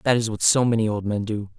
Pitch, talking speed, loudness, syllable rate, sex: 110 Hz, 300 wpm, -22 LUFS, 6.3 syllables/s, male